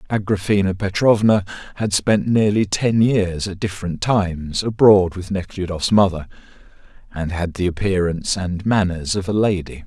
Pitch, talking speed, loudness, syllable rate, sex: 95 Hz, 140 wpm, -19 LUFS, 4.8 syllables/s, male